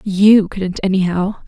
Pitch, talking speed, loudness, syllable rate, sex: 195 Hz, 120 wpm, -15 LUFS, 3.9 syllables/s, female